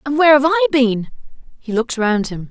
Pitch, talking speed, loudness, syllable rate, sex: 265 Hz, 215 wpm, -16 LUFS, 6.4 syllables/s, female